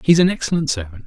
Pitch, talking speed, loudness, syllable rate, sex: 140 Hz, 225 wpm, -18 LUFS, 7.2 syllables/s, male